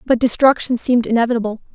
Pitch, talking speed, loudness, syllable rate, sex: 240 Hz, 135 wpm, -16 LUFS, 7.2 syllables/s, female